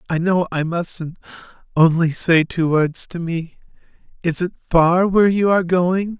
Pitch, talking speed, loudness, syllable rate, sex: 170 Hz, 155 wpm, -18 LUFS, 4.4 syllables/s, male